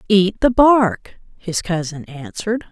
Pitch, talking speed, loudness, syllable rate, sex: 200 Hz, 135 wpm, -17 LUFS, 4.0 syllables/s, female